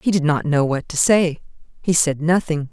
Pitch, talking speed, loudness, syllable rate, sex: 160 Hz, 220 wpm, -18 LUFS, 5.0 syllables/s, female